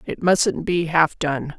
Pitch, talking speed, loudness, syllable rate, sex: 165 Hz, 190 wpm, -20 LUFS, 3.4 syllables/s, female